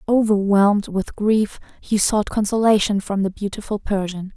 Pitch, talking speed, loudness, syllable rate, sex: 205 Hz, 140 wpm, -20 LUFS, 4.8 syllables/s, female